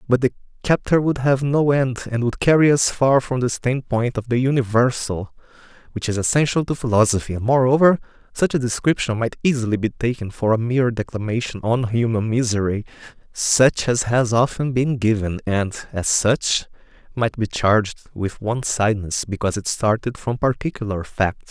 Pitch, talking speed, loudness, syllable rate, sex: 120 Hz, 165 wpm, -20 LUFS, 5.2 syllables/s, male